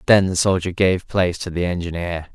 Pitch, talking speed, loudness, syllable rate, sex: 90 Hz, 205 wpm, -20 LUFS, 5.6 syllables/s, male